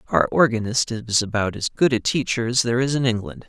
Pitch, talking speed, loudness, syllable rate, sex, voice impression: 115 Hz, 225 wpm, -21 LUFS, 5.9 syllables/s, male, masculine, adult-like, slightly middle-aged, thick, slightly tensed, slightly powerful, slightly dark, slightly hard, clear, slightly fluent, cool, intellectual, slightly refreshing, sincere, very calm, slightly mature, slightly friendly, slightly reassuring, slightly unique, slightly wild, slightly sweet, slightly lively, kind